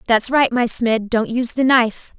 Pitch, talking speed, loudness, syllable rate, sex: 240 Hz, 220 wpm, -17 LUFS, 5.1 syllables/s, female